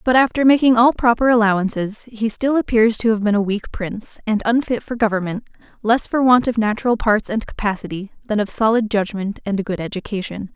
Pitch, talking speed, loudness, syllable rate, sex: 220 Hz, 200 wpm, -18 LUFS, 5.8 syllables/s, female